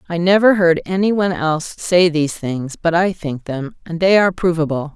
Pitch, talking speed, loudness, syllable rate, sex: 170 Hz, 205 wpm, -17 LUFS, 5.5 syllables/s, female